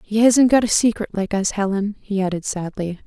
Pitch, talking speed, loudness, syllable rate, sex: 205 Hz, 215 wpm, -19 LUFS, 5.3 syllables/s, female